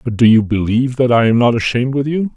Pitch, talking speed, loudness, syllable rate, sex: 120 Hz, 280 wpm, -14 LUFS, 6.7 syllables/s, male